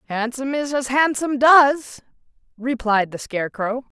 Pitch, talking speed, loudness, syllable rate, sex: 255 Hz, 120 wpm, -19 LUFS, 4.8 syllables/s, female